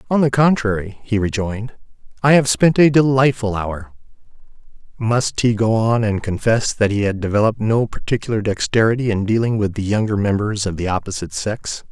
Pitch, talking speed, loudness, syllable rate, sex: 110 Hz, 170 wpm, -18 LUFS, 5.5 syllables/s, male